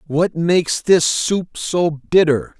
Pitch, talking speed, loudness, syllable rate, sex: 165 Hz, 140 wpm, -17 LUFS, 3.3 syllables/s, male